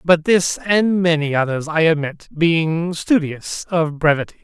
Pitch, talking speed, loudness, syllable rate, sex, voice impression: 160 Hz, 150 wpm, -18 LUFS, 4.0 syllables/s, male, masculine, adult-like, slightly middle-aged, thick, slightly tensed, slightly weak, bright, slightly soft, slightly clear, fluent, cool, intellectual, slightly refreshing, sincere, very calm, slightly mature, friendly, reassuring, unique, elegant, slightly wild, slightly sweet, lively, kind, slightly modest